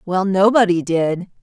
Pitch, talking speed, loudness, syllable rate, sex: 190 Hz, 125 wpm, -16 LUFS, 4.1 syllables/s, female